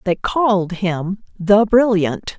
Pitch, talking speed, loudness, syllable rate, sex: 200 Hz, 125 wpm, -17 LUFS, 3.3 syllables/s, female